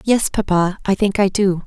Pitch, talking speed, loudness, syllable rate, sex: 195 Hz, 215 wpm, -17 LUFS, 4.7 syllables/s, female